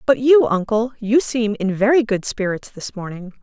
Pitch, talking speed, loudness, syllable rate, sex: 225 Hz, 195 wpm, -18 LUFS, 4.7 syllables/s, female